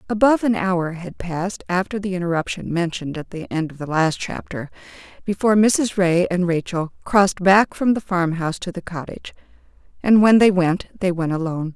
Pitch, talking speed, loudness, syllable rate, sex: 180 Hz, 190 wpm, -20 LUFS, 5.5 syllables/s, female